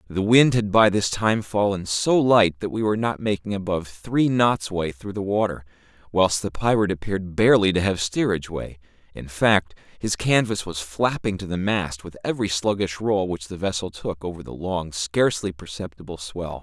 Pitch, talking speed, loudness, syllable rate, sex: 95 Hz, 190 wpm, -22 LUFS, 5.2 syllables/s, male